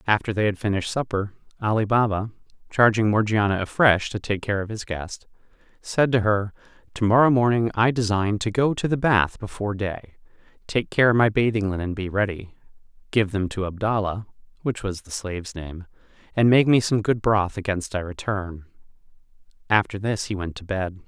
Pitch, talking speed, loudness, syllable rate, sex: 105 Hz, 175 wpm, -23 LUFS, 5.1 syllables/s, male